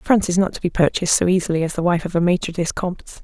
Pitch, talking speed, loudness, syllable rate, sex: 175 Hz, 295 wpm, -19 LUFS, 7.4 syllables/s, female